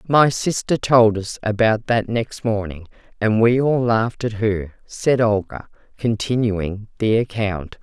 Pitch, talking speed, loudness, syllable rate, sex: 110 Hz, 145 wpm, -19 LUFS, 3.9 syllables/s, female